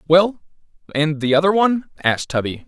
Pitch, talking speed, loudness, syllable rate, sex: 165 Hz, 155 wpm, -18 LUFS, 6.0 syllables/s, male